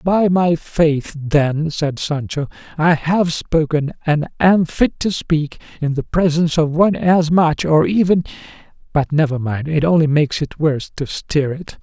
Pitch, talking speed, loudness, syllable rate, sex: 160 Hz, 160 wpm, -17 LUFS, 4.3 syllables/s, male